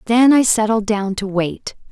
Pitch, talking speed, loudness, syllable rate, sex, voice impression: 215 Hz, 190 wpm, -16 LUFS, 4.4 syllables/s, female, very feminine, very adult-like, very thin, tensed, slightly powerful, very bright, soft, very clear, fluent, cool, very intellectual, refreshing, slightly sincere, calm, very friendly, reassuring, very unique, very elegant, slightly wild, sweet, very lively, kind, intense, sharp, light